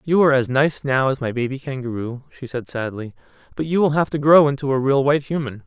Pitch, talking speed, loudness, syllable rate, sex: 135 Hz, 245 wpm, -20 LUFS, 6.2 syllables/s, male